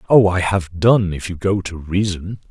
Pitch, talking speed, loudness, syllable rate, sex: 95 Hz, 215 wpm, -18 LUFS, 4.6 syllables/s, male